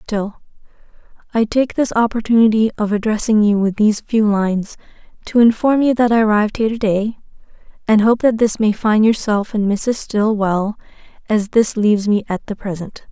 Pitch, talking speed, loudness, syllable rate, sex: 215 Hz, 175 wpm, -16 LUFS, 5.2 syllables/s, female